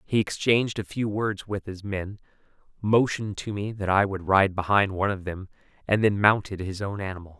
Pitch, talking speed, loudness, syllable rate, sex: 100 Hz, 205 wpm, -25 LUFS, 5.4 syllables/s, male